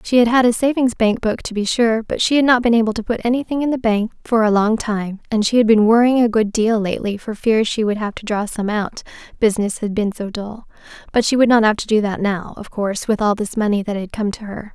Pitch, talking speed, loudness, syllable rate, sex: 220 Hz, 275 wpm, -18 LUFS, 5.8 syllables/s, female